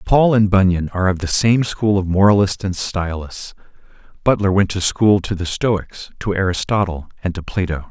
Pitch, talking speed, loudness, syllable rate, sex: 95 Hz, 180 wpm, -17 LUFS, 5.0 syllables/s, male